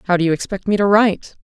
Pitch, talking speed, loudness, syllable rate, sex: 190 Hz, 295 wpm, -17 LUFS, 6.7 syllables/s, female